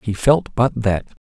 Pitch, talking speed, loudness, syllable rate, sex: 120 Hz, 195 wpm, -18 LUFS, 3.8 syllables/s, male